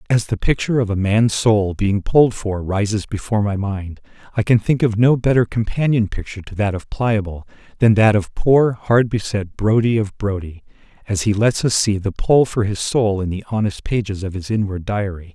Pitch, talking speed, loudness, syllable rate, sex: 105 Hz, 205 wpm, -18 LUFS, 5.2 syllables/s, male